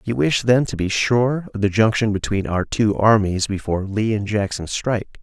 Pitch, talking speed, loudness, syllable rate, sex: 105 Hz, 205 wpm, -19 LUFS, 4.9 syllables/s, male